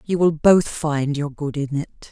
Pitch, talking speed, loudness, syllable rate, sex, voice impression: 150 Hz, 225 wpm, -20 LUFS, 4.0 syllables/s, female, feminine, slightly gender-neutral, middle-aged, slightly relaxed, powerful, slightly hard, slightly muffled, raspy, intellectual, calm, elegant, lively, strict, sharp